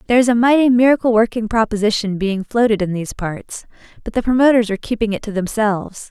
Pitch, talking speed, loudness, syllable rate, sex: 220 Hz, 195 wpm, -17 LUFS, 6.5 syllables/s, female